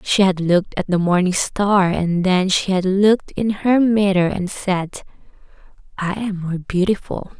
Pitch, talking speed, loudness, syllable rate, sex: 190 Hz, 170 wpm, -18 LUFS, 4.3 syllables/s, female